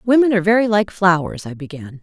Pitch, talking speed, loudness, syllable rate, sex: 195 Hz, 205 wpm, -16 LUFS, 6.3 syllables/s, female